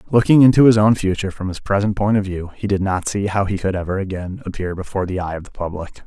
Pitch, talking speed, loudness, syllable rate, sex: 95 Hz, 265 wpm, -18 LUFS, 6.6 syllables/s, male